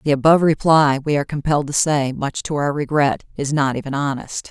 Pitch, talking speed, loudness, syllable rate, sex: 145 Hz, 215 wpm, -18 LUFS, 5.9 syllables/s, female